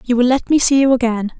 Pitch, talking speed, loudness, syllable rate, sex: 250 Hz, 300 wpm, -14 LUFS, 6.5 syllables/s, female